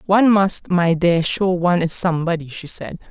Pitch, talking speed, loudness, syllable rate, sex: 175 Hz, 195 wpm, -18 LUFS, 5.2 syllables/s, female